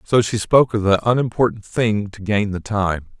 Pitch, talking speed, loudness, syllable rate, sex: 105 Hz, 205 wpm, -19 LUFS, 5.1 syllables/s, male